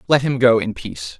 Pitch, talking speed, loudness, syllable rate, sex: 120 Hz, 250 wpm, -17 LUFS, 5.8 syllables/s, male